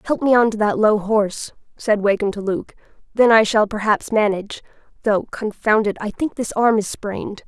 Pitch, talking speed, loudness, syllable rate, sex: 215 Hz, 185 wpm, -19 LUFS, 5.2 syllables/s, female